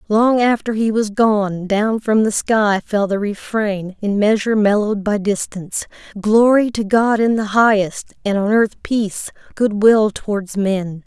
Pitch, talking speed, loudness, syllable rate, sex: 210 Hz, 170 wpm, -17 LUFS, 4.3 syllables/s, female